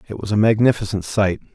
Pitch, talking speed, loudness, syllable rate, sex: 105 Hz, 195 wpm, -19 LUFS, 6.4 syllables/s, male